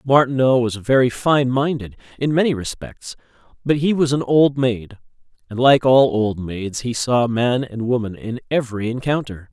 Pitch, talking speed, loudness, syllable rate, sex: 125 Hz, 170 wpm, -18 LUFS, 4.7 syllables/s, male